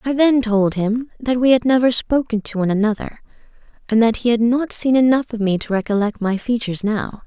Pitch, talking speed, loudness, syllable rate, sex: 230 Hz, 215 wpm, -18 LUFS, 5.6 syllables/s, female